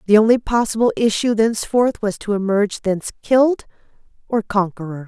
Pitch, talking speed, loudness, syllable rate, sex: 215 Hz, 140 wpm, -18 LUFS, 5.9 syllables/s, female